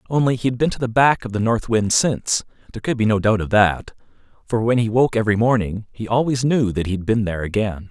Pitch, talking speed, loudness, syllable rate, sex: 110 Hz, 250 wpm, -19 LUFS, 6.3 syllables/s, male